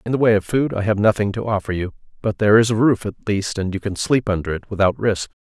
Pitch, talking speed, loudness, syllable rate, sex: 105 Hz, 285 wpm, -19 LUFS, 6.4 syllables/s, male